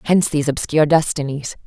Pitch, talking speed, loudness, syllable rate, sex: 150 Hz, 145 wpm, -18 LUFS, 6.8 syllables/s, female